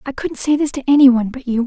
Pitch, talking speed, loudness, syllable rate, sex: 265 Hz, 325 wpm, -15 LUFS, 7.0 syllables/s, female